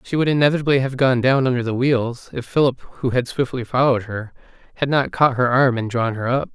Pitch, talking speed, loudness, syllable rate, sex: 130 Hz, 230 wpm, -19 LUFS, 6.0 syllables/s, male